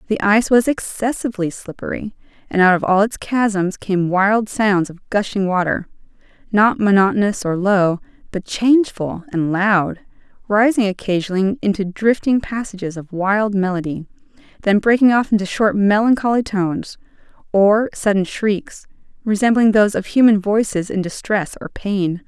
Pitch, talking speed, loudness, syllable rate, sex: 205 Hz, 140 wpm, -17 LUFS, 4.8 syllables/s, female